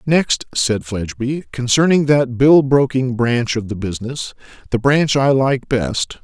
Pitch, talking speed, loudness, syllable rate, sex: 125 Hz, 155 wpm, -17 LUFS, 4.1 syllables/s, male